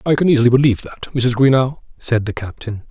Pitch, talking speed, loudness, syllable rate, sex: 125 Hz, 205 wpm, -16 LUFS, 6.4 syllables/s, male